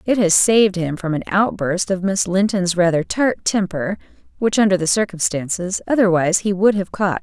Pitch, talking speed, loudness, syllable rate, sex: 190 Hz, 185 wpm, -18 LUFS, 5.2 syllables/s, female